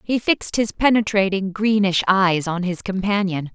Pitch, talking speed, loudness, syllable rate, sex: 195 Hz, 150 wpm, -19 LUFS, 4.7 syllables/s, female